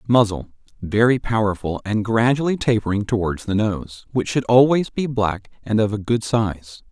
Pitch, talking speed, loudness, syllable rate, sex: 110 Hz, 155 wpm, -20 LUFS, 4.8 syllables/s, male